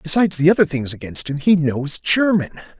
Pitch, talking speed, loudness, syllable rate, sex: 160 Hz, 195 wpm, -18 LUFS, 5.6 syllables/s, male